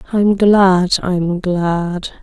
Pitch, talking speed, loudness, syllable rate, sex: 185 Hz, 80 wpm, -14 LUFS, 2.2 syllables/s, female